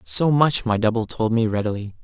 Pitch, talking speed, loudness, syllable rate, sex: 115 Hz, 205 wpm, -20 LUFS, 5.3 syllables/s, male